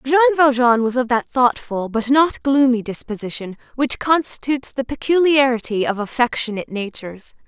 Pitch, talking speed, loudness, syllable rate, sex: 250 Hz, 135 wpm, -18 LUFS, 5.2 syllables/s, female